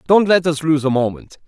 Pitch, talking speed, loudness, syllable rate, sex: 155 Hz, 245 wpm, -16 LUFS, 5.4 syllables/s, male